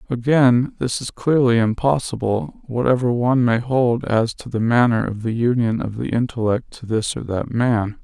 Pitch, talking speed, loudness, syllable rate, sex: 120 Hz, 180 wpm, -19 LUFS, 4.7 syllables/s, male